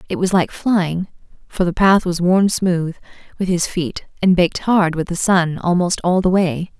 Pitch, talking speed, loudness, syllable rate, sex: 180 Hz, 205 wpm, -17 LUFS, 4.4 syllables/s, female